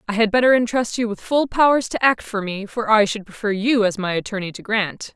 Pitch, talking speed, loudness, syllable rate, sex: 215 Hz, 255 wpm, -19 LUFS, 5.6 syllables/s, female